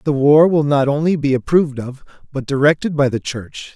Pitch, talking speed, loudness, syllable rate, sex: 145 Hz, 210 wpm, -16 LUFS, 5.4 syllables/s, male